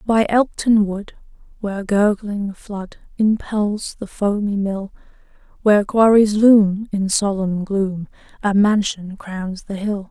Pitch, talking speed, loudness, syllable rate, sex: 205 Hz, 125 wpm, -18 LUFS, 3.6 syllables/s, female